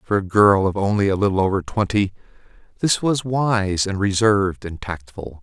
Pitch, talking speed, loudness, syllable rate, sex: 100 Hz, 175 wpm, -20 LUFS, 5.0 syllables/s, male